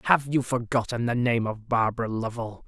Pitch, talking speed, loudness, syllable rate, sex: 120 Hz, 180 wpm, -26 LUFS, 5.2 syllables/s, male